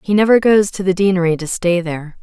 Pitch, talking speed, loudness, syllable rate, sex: 185 Hz, 245 wpm, -15 LUFS, 6.2 syllables/s, female